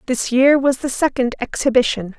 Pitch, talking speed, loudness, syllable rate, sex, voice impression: 255 Hz, 165 wpm, -17 LUFS, 5.1 syllables/s, female, very feminine, slightly young, very thin, tensed, slightly powerful, bright, hard, slightly muffled, fluent, cute, intellectual, very refreshing, sincere, calm, slightly friendly, slightly reassuring, unique, elegant, slightly wild, slightly sweet, slightly lively, kind, modest, slightly light